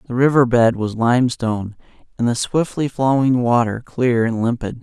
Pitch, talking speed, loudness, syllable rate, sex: 120 Hz, 160 wpm, -18 LUFS, 5.0 syllables/s, male